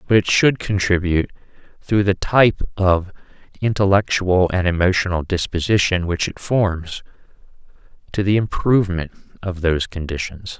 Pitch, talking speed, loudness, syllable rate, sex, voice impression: 95 Hz, 120 wpm, -19 LUFS, 5.0 syllables/s, male, masculine, adult-like, slightly dark, calm, unique